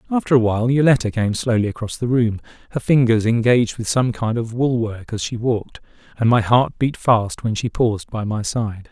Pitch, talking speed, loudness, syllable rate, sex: 115 Hz, 215 wpm, -19 LUFS, 5.4 syllables/s, male